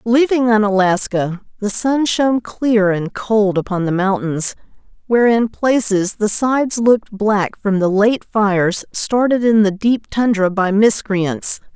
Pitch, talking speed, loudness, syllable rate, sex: 210 Hz, 150 wpm, -16 LUFS, 4.1 syllables/s, female